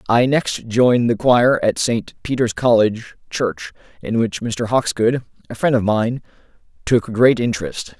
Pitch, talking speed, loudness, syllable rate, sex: 115 Hz, 160 wpm, -18 LUFS, 4.5 syllables/s, male